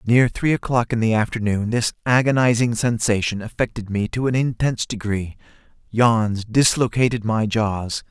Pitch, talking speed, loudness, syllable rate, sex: 115 Hz, 140 wpm, -20 LUFS, 4.8 syllables/s, male